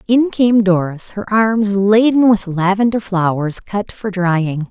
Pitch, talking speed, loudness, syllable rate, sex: 200 Hz, 155 wpm, -15 LUFS, 3.7 syllables/s, female